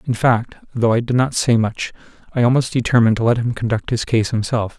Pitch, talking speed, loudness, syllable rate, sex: 120 Hz, 225 wpm, -18 LUFS, 5.9 syllables/s, male